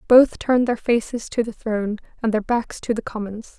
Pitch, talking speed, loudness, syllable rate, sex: 225 Hz, 220 wpm, -22 LUFS, 5.3 syllables/s, female